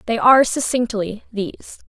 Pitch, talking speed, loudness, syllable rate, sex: 225 Hz, 125 wpm, -18 LUFS, 5.1 syllables/s, female